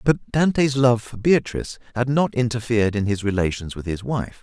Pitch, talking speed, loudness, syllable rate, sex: 115 Hz, 190 wpm, -21 LUFS, 5.3 syllables/s, male